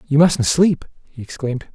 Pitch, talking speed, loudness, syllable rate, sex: 150 Hz, 170 wpm, -18 LUFS, 5.0 syllables/s, male